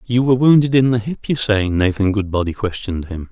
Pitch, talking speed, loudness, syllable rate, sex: 110 Hz, 215 wpm, -17 LUFS, 5.9 syllables/s, male